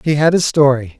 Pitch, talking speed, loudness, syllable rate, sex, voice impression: 145 Hz, 240 wpm, -13 LUFS, 5.6 syllables/s, male, masculine, adult-like, slightly thick, slightly soft, calm, friendly, slightly sweet, kind